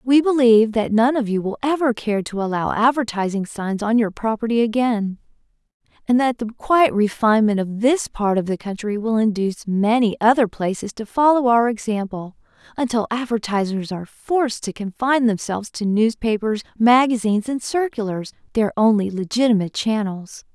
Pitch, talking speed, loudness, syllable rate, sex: 225 Hz, 155 wpm, -20 LUFS, 5.3 syllables/s, female